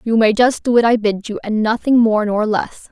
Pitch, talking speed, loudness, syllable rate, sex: 225 Hz, 270 wpm, -16 LUFS, 5.0 syllables/s, female